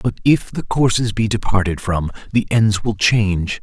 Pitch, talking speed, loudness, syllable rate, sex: 105 Hz, 180 wpm, -18 LUFS, 4.7 syllables/s, male